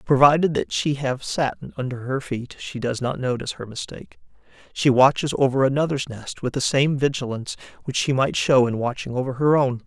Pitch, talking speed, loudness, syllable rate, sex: 135 Hz, 195 wpm, -22 LUFS, 5.6 syllables/s, male